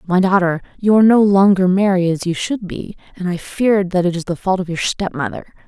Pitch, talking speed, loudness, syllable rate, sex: 185 Hz, 245 wpm, -16 LUFS, 5.5 syllables/s, female